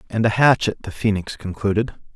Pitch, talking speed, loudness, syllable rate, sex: 105 Hz, 165 wpm, -20 LUFS, 5.8 syllables/s, male